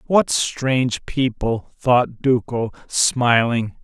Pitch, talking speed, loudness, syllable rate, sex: 125 Hz, 95 wpm, -19 LUFS, 2.9 syllables/s, male